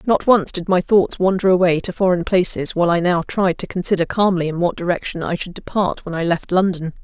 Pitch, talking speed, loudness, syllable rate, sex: 180 Hz, 230 wpm, -18 LUFS, 5.7 syllables/s, female